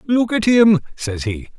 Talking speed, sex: 190 wpm, male